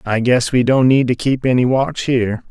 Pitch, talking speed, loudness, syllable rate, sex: 125 Hz, 240 wpm, -15 LUFS, 5.1 syllables/s, male